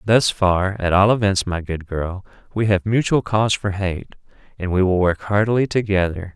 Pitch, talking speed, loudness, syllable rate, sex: 100 Hz, 190 wpm, -19 LUFS, 4.9 syllables/s, male